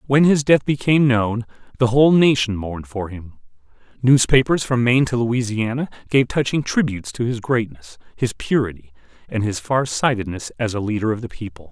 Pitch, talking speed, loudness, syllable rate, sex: 115 Hz, 175 wpm, -19 LUFS, 5.5 syllables/s, male